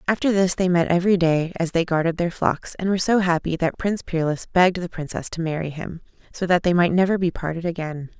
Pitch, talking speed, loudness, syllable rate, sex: 175 Hz, 235 wpm, -22 LUFS, 6.0 syllables/s, female